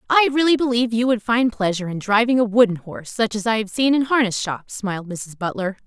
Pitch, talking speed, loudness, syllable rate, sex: 220 Hz, 235 wpm, -20 LUFS, 6.1 syllables/s, female